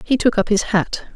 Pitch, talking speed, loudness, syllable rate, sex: 220 Hz, 260 wpm, -18 LUFS, 5.0 syllables/s, female